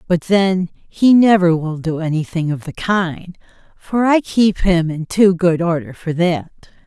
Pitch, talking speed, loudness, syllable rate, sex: 175 Hz, 175 wpm, -16 LUFS, 4.0 syllables/s, female